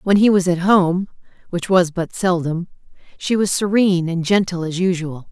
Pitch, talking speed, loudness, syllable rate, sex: 180 Hz, 180 wpm, -18 LUFS, 4.9 syllables/s, female